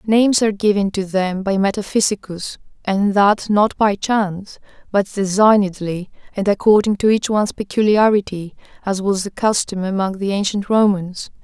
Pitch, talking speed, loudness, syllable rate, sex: 200 Hz, 145 wpm, -17 LUFS, 5.0 syllables/s, female